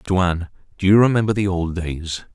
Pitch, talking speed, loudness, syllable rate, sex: 95 Hz, 180 wpm, -19 LUFS, 5.2 syllables/s, male